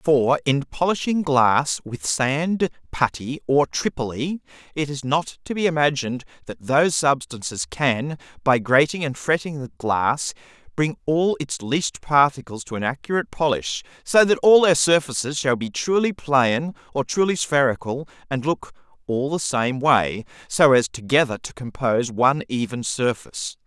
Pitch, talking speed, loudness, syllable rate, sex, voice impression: 140 Hz, 150 wpm, -21 LUFS, 4.6 syllables/s, male, masculine, adult-like, bright, clear, slightly halting, friendly, unique, slightly wild, lively, slightly kind, slightly modest